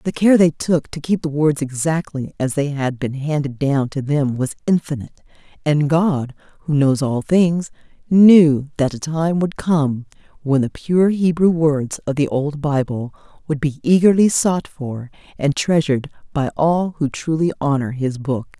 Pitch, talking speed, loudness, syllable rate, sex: 150 Hz, 175 wpm, -18 LUFS, 4.4 syllables/s, female